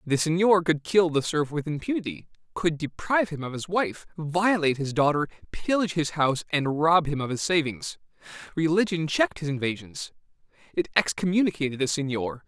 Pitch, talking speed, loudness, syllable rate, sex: 160 Hz, 165 wpm, -25 LUFS, 5.7 syllables/s, male